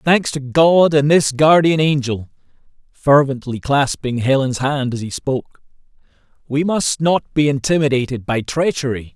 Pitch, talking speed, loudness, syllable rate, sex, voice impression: 140 Hz, 140 wpm, -17 LUFS, 4.5 syllables/s, male, masculine, middle-aged, tensed, powerful, bright, raspy, friendly, wild, lively, slightly intense